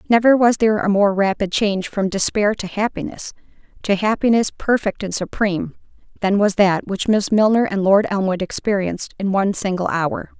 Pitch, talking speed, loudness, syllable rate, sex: 200 Hz, 160 wpm, -18 LUFS, 5.4 syllables/s, female